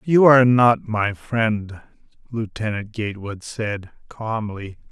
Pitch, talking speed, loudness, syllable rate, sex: 110 Hz, 110 wpm, -20 LUFS, 3.8 syllables/s, male